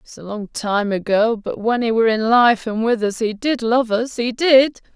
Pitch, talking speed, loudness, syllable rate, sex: 230 Hz, 240 wpm, -18 LUFS, 4.7 syllables/s, female